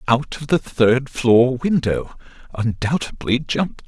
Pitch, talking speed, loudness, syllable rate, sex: 130 Hz, 125 wpm, -19 LUFS, 3.9 syllables/s, male